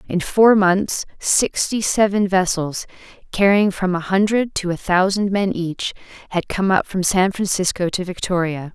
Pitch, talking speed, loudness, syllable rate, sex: 190 Hz, 160 wpm, -18 LUFS, 4.3 syllables/s, female